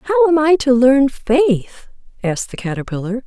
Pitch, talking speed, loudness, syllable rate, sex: 255 Hz, 165 wpm, -16 LUFS, 4.5 syllables/s, female